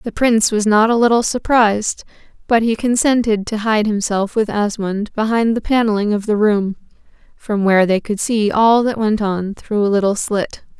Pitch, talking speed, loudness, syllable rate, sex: 215 Hz, 190 wpm, -16 LUFS, 5.0 syllables/s, female